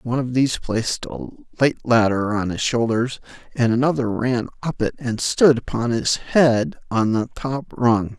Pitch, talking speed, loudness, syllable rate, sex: 120 Hz, 175 wpm, -20 LUFS, 4.6 syllables/s, male